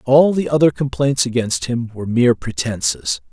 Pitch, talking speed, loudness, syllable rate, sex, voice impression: 130 Hz, 165 wpm, -17 LUFS, 5.1 syllables/s, male, very masculine, slightly old, thick, tensed, slightly powerful, bright, slightly soft, muffled, fluent, raspy, cool, intellectual, slightly refreshing, sincere, calm, friendly, reassuring, unique, slightly elegant, wild, slightly sweet, lively, kind, slightly modest